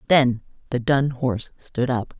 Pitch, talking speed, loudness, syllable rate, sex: 125 Hz, 165 wpm, -23 LUFS, 4.2 syllables/s, female